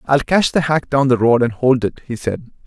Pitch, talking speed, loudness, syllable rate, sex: 130 Hz, 270 wpm, -16 LUFS, 5.1 syllables/s, male